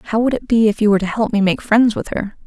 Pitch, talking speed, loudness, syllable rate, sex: 215 Hz, 340 wpm, -16 LUFS, 6.9 syllables/s, female